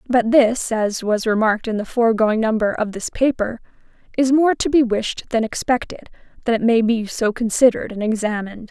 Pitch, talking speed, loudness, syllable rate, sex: 230 Hz, 185 wpm, -19 LUFS, 3.9 syllables/s, female